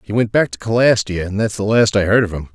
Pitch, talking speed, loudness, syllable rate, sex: 105 Hz, 305 wpm, -16 LUFS, 6.2 syllables/s, male